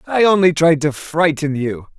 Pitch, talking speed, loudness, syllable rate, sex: 160 Hz, 180 wpm, -16 LUFS, 4.5 syllables/s, male